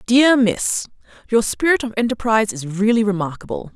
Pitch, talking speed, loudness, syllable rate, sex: 220 Hz, 130 wpm, -18 LUFS, 5.4 syllables/s, female